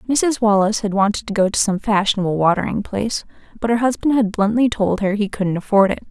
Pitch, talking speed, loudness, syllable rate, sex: 210 Hz, 215 wpm, -18 LUFS, 6.1 syllables/s, female